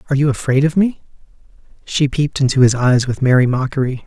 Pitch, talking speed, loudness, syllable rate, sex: 135 Hz, 190 wpm, -16 LUFS, 6.6 syllables/s, male